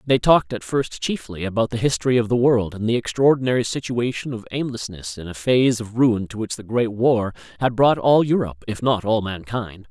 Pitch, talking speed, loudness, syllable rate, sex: 115 Hz, 210 wpm, -21 LUFS, 5.6 syllables/s, male